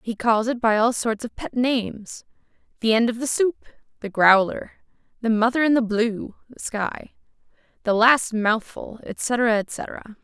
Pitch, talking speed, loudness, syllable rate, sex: 230 Hz, 165 wpm, -21 LUFS, 4.4 syllables/s, female